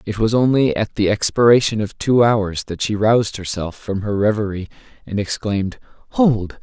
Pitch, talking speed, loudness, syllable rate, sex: 105 Hz, 170 wpm, -18 LUFS, 5.0 syllables/s, male